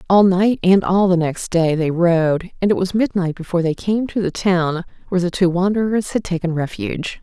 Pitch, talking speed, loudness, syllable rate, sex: 180 Hz, 215 wpm, -18 LUFS, 5.2 syllables/s, female